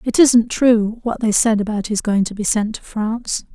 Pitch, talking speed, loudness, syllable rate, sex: 220 Hz, 235 wpm, -17 LUFS, 4.8 syllables/s, female